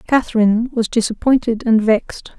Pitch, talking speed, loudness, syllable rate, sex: 230 Hz, 125 wpm, -16 LUFS, 5.5 syllables/s, female